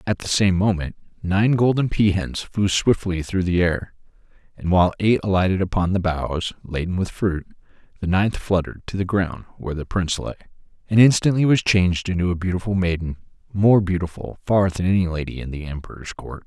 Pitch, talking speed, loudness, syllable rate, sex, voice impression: 95 Hz, 185 wpm, -21 LUFS, 5.6 syllables/s, male, very masculine, slightly old, thick, intellectual, sincere, very calm, mature, slightly wild, slightly kind